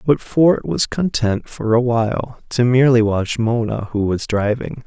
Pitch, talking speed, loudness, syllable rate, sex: 120 Hz, 175 wpm, -18 LUFS, 4.4 syllables/s, male